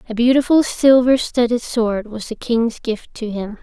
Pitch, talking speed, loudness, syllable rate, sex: 235 Hz, 180 wpm, -17 LUFS, 4.4 syllables/s, female